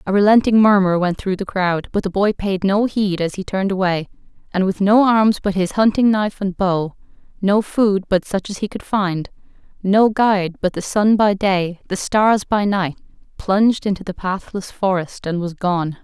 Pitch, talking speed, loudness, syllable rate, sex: 195 Hz, 200 wpm, -18 LUFS, 4.8 syllables/s, female